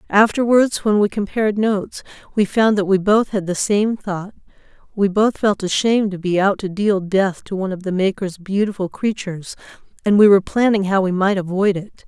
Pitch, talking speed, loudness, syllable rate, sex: 200 Hz, 200 wpm, -18 LUFS, 5.4 syllables/s, female